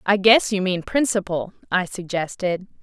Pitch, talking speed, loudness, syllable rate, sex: 190 Hz, 150 wpm, -21 LUFS, 4.6 syllables/s, female